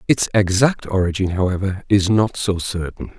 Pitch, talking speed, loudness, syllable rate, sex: 100 Hz, 150 wpm, -19 LUFS, 4.9 syllables/s, male